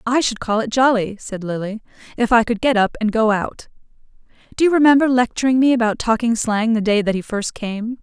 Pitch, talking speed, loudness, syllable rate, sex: 230 Hz, 215 wpm, -18 LUFS, 5.5 syllables/s, female